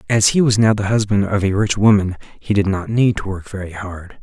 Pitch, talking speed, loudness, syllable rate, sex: 100 Hz, 255 wpm, -17 LUFS, 5.4 syllables/s, male